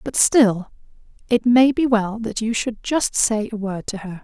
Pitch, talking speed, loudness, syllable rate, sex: 225 Hz, 210 wpm, -19 LUFS, 4.3 syllables/s, female